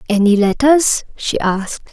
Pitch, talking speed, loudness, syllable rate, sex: 225 Hz, 125 wpm, -15 LUFS, 4.4 syllables/s, female